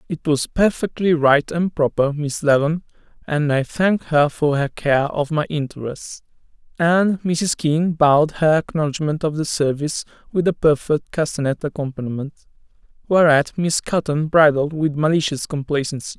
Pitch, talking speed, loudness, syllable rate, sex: 155 Hz, 145 wpm, -19 LUFS, 4.8 syllables/s, male